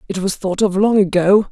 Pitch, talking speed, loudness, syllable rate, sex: 195 Hz, 240 wpm, -16 LUFS, 5.4 syllables/s, female